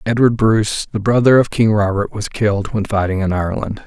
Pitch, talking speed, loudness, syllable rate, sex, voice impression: 105 Hz, 200 wpm, -16 LUFS, 5.7 syllables/s, male, very masculine, very adult-like, very middle-aged, very thick, very tensed, very powerful, slightly dark, hard, clear, slightly fluent, very cool, very intellectual, slightly refreshing, very sincere, very calm, mature, friendly, very reassuring, unique, elegant, wild, very sweet, slightly lively, kind, slightly modest